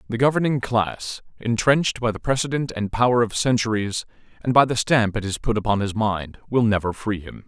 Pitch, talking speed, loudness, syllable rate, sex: 115 Hz, 200 wpm, -22 LUFS, 5.5 syllables/s, male